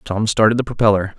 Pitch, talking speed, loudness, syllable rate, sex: 110 Hz, 200 wpm, -16 LUFS, 6.5 syllables/s, male